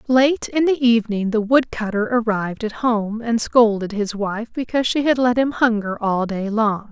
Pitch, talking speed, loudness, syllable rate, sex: 225 Hz, 190 wpm, -19 LUFS, 4.8 syllables/s, female